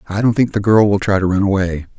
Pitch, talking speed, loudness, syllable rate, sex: 100 Hz, 305 wpm, -15 LUFS, 6.4 syllables/s, male